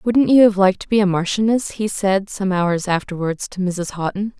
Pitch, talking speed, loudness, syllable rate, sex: 195 Hz, 220 wpm, -18 LUFS, 5.1 syllables/s, female